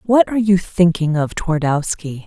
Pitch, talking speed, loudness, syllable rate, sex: 175 Hz, 160 wpm, -17 LUFS, 4.6 syllables/s, female